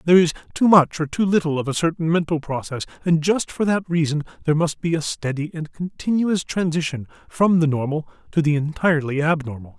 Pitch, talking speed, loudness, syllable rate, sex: 160 Hz, 195 wpm, -21 LUFS, 5.8 syllables/s, male